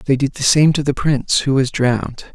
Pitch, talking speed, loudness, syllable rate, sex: 135 Hz, 255 wpm, -16 LUFS, 5.4 syllables/s, male